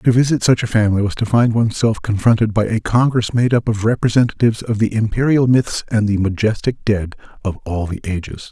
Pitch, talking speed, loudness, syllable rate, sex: 110 Hz, 210 wpm, -17 LUFS, 5.8 syllables/s, male